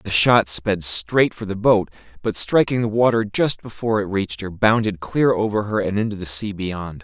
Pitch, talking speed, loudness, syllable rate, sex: 105 Hz, 215 wpm, -20 LUFS, 4.9 syllables/s, male